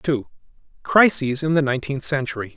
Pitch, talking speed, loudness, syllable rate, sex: 145 Hz, 140 wpm, -20 LUFS, 5.6 syllables/s, male